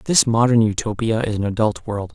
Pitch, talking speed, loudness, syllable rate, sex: 110 Hz, 195 wpm, -19 LUFS, 5.2 syllables/s, male